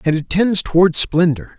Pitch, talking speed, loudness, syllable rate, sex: 170 Hz, 190 wpm, -15 LUFS, 4.7 syllables/s, male